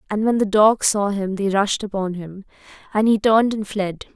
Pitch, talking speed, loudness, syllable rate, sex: 205 Hz, 215 wpm, -19 LUFS, 5.0 syllables/s, female